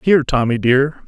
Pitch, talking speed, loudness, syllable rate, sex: 135 Hz, 165 wpm, -16 LUFS, 5.2 syllables/s, male